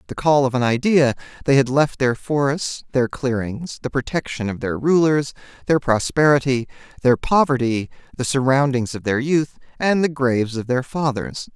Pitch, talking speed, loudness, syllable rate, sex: 135 Hz, 170 wpm, -20 LUFS, 4.9 syllables/s, male